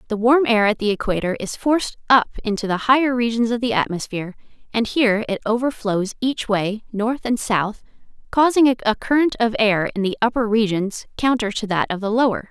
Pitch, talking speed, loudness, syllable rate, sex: 225 Hz, 190 wpm, -20 LUFS, 5.5 syllables/s, female